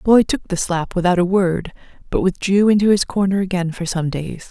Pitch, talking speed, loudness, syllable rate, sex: 185 Hz, 225 wpm, -18 LUFS, 5.5 syllables/s, female